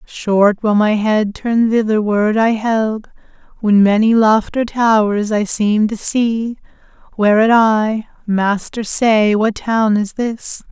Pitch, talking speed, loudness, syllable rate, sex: 215 Hz, 135 wpm, -15 LUFS, 3.7 syllables/s, female